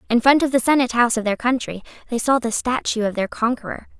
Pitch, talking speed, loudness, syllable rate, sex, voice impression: 240 Hz, 240 wpm, -19 LUFS, 6.7 syllables/s, female, gender-neutral, very young, very fluent, cute, refreshing, slightly unique, lively